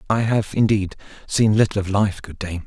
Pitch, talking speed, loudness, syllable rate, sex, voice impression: 100 Hz, 205 wpm, -20 LUFS, 5.1 syllables/s, male, very masculine, very middle-aged, very thick, slightly tensed, very powerful, dark, soft, slightly muffled, fluent, slightly raspy, cool, intellectual, slightly refreshing, very sincere, very calm, very mature, very friendly, reassuring, unique, slightly elegant, wild, sweet, slightly lively, kind, modest